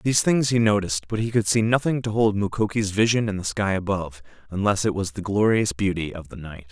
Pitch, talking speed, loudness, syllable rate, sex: 100 Hz, 230 wpm, -22 LUFS, 6.0 syllables/s, male